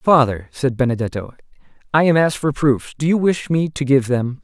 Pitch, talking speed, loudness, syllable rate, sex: 140 Hz, 205 wpm, -18 LUFS, 5.4 syllables/s, male